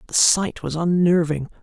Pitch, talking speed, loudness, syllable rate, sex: 170 Hz, 150 wpm, -19 LUFS, 4.5 syllables/s, female